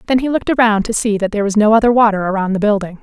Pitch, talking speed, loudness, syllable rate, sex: 215 Hz, 300 wpm, -14 LUFS, 7.9 syllables/s, female